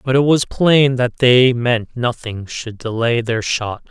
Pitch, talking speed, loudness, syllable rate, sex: 120 Hz, 185 wpm, -16 LUFS, 3.7 syllables/s, male